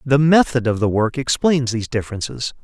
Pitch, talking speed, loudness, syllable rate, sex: 130 Hz, 180 wpm, -18 LUFS, 5.7 syllables/s, male